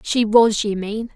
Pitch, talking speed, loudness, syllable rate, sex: 215 Hz, 210 wpm, -18 LUFS, 3.9 syllables/s, female